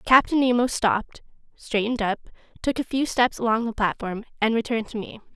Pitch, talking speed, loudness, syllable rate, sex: 230 Hz, 180 wpm, -24 LUFS, 5.9 syllables/s, female